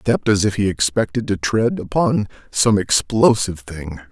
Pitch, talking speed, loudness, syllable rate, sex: 105 Hz, 175 wpm, -18 LUFS, 5.2 syllables/s, male